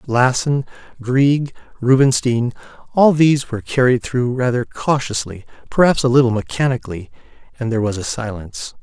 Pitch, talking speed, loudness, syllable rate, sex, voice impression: 125 Hz, 120 wpm, -17 LUFS, 5.4 syllables/s, male, masculine, adult-like, tensed, powerful, clear, slightly mature, friendly, wild, lively, slightly kind